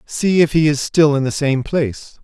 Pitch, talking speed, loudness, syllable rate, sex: 150 Hz, 240 wpm, -16 LUFS, 4.9 syllables/s, male